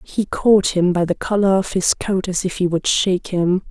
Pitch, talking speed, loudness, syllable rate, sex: 185 Hz, 245 wpm, -18 LUFS, 4.8 syllables/s, female